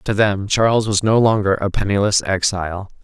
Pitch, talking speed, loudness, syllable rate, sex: 100 Hz, 180 wpm, -17 LUFS, 5.3 syllables/s, male